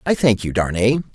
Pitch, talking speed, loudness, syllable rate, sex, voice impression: 115 Hz, 210 wpm, -18 LUFS, 5.6 syllables/s, male, very masculine, very adult-like, middle-aged, very thick, tensed, slightly powerful, bright, slightly hard, slightly muffled, fluent, slightly raspy, cool, very intellectual, sincere, very calm, very mature, slightly friendly, slightly reassuring, unique, wild, slightly sweet, slightly lively, kind